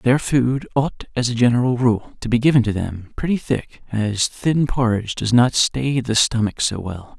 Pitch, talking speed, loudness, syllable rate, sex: 120 Hz, 200 wpm, -19 LUFS, 4.6 syllables/s, male